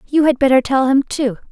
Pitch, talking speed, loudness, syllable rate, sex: 265 Hz, 235 wpm, -15 LUFS, 5.7 syllables/s, female